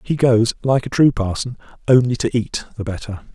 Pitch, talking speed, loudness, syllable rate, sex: 120 Hz, 195 wpm, -18 LUFS, 5.2 syllables/s, male